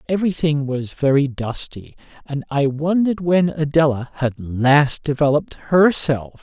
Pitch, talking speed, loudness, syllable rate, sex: 145 Hz, 120 wpm, -19 LUFS, 4.5 syllables/s, male